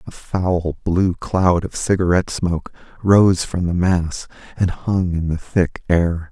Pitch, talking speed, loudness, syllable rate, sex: 90 Hz, 160 wpm, -19 LUFS, 3.8 syllables/s, male